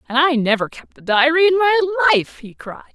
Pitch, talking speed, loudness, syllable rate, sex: 295 Hz, 225 wpm, -16 LUFS, 5.9 syllables/s, female